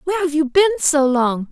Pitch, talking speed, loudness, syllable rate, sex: 305 Hz, 240 wpm, -16 LUFS, 5.7 syllables/s, female